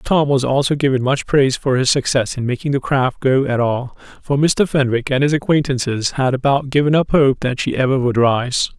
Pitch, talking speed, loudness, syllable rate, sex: 135 Hz, 220 wpm, -17 LUFS, 5.3 syllables/s, male